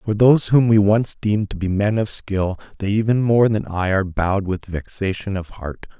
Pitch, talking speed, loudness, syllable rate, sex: 100 Hz, 220 wpm, -19 LUFS, 5.2 syllables/s, male